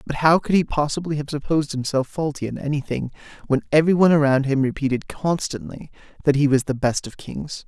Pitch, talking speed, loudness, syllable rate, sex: 145 Hz, 190 wpm, -21 LUFS, 5.9 syllables/s, male